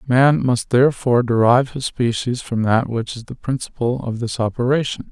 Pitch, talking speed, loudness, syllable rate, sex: 125 Hz, 175 wpm, -19 LUFS, 5.3 syllables/s, male